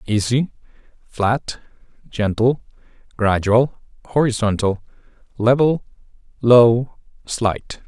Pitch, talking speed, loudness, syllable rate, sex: 115 Hz, 60 wpm, -18 LUFS, 3.3 syllables/s, male